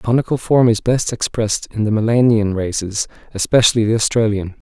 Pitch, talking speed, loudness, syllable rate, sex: 110 Hz, 165 wpm, -17 LUFS, 5.8 syllables/s, male